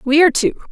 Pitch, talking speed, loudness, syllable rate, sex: 315 Hz, 250 wpm, -14 LUFS, 8.7 syllables/s, female